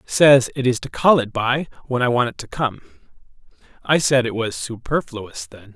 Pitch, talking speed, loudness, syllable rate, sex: 120 Hz, 200 wpm, -19 LUFS, 4.8 syllables/s, male